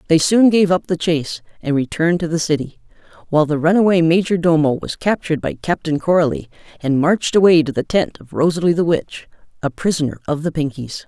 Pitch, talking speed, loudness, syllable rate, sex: 160 Hz, 190 wpm, -17 LUFS, 6.0 syllables/s, female